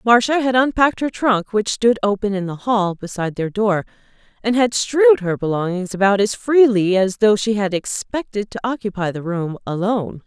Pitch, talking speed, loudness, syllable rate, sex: 210 Hz, 185 wpm, -18 LUFS, 5.2 syllables/s, female